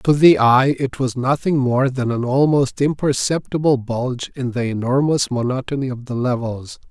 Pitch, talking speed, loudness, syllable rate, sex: 130 Hz, 165 wpm, -18 LUFS, 4.8 syllables/s, male